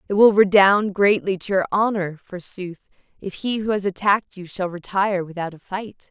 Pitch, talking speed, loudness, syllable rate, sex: 195 Hz, 185 wpm, -20 LUFS, 5.2 syllables/s, female